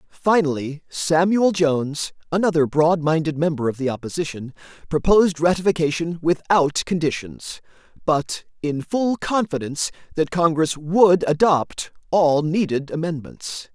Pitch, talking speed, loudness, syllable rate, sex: 160 Hz, 110 wpm, -21 LUFS, 4.5 syllables/s, male